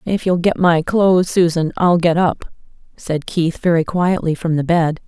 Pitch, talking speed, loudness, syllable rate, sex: 170 Hz, 190 wpm, -16 LUFS, 4.6 syllables/s, female